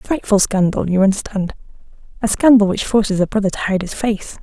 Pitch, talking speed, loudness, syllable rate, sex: 205 Hz, 205 wpm, -16 LUFS, 6.0 syllables/s, female